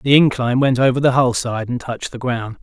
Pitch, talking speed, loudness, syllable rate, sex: 125 Hz, 250 wpm, -17 LUFS, 5.9 syllables/s, male